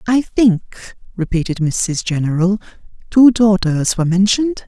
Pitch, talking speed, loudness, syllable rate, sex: 195 Hz, 115 wpm, -15 LUFS, 4.4 syllables/s, female